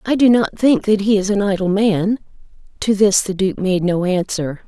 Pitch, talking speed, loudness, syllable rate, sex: 200 Hz, 220 wpm, -17 LUFS, 4.9 syllables/s, female